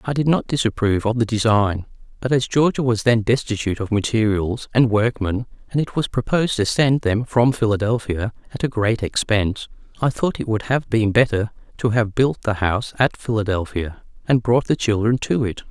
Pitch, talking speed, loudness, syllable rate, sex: 115 Hz, 190 wpm, -20 LUFS, 5.4 syllables/s, male